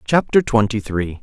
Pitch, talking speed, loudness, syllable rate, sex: 110 Hz, 145 wpm, -18 LUFS, 4.4 syllables/s, male